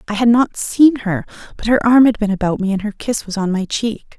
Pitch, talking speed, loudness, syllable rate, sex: 215 Hz, 275 wpm, -16 LUFS, 5.4 syllables/s, female